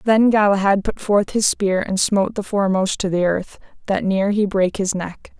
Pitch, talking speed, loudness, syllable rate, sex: 200 Hz, 210 wpm, -19 LUFS, 5.0 syllables/s, female